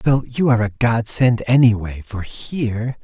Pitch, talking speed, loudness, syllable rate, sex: 115 Hz, 160 wpm, -18 LUFS, 4.7 syllables/s, male